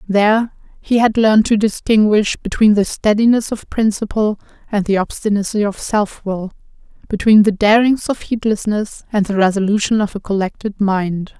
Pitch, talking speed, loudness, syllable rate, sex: 210 Hz, 155 wpm, -16 LUFS, 4.9 syllables/s, female